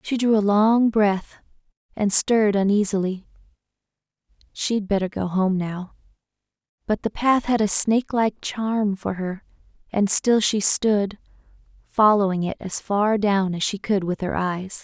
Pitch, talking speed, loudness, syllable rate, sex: 205 Hz, 145 wpm, -21 LUFS, 4.2 syllables/s, female